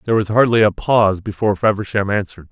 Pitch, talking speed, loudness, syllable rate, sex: 105 Hz, 190 wpm, -16 LUFS, 7.2 syllables/s, male